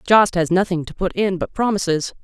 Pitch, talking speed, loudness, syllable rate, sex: 190 Hz, 215 wpm, -19 LUFS, 5.5 syllables/s, female